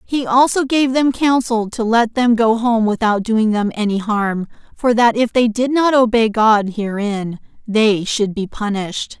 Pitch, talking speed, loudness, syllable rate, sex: 225 Hz, 185 wpm, -16 LUFS, 4.3 syllables/s, female